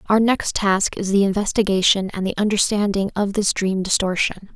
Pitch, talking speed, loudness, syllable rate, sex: 200 Hz, 170 wpm, -19 LUFS, 5.1 syllables/s, female